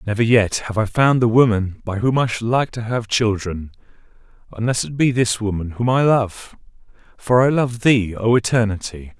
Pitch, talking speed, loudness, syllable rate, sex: 110 Hz, 190 wpm, -18 LUFS, 4.9 syllables/s, male